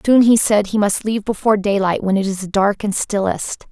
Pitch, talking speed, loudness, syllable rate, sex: 205 Hz, 225 wpm, -17 LUFS, 5.4 syllables/s, female